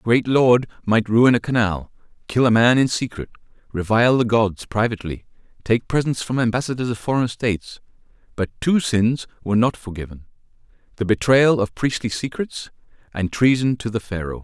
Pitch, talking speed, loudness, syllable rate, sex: 115 Hz, 160 wpm, -20 LUFS, 5.3 syllables/s, male